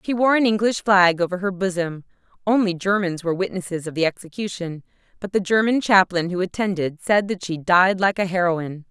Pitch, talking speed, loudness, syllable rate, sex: 185 Hz, 190 wpm, -21 LUFS, 5.7 syllables/s, female